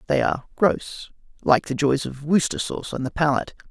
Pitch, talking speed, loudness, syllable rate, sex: 145 Hz, 195 wpm, -23 LUFS, 5.9 syllables/s, male